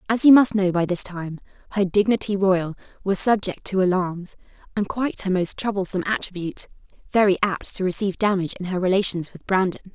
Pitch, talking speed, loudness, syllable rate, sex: 190 Hz, 175 wpm, -21 LUFS, 6.0 syllables/s, female